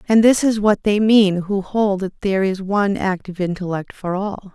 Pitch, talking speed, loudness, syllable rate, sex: 195 Hz, 210 wpm, -18 LUFS, 5.0 syllables/s, female